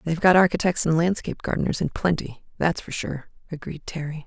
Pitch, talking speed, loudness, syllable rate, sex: 165 Hz, 170 wpm, -23 LUFS, 5.9 syllables/s, female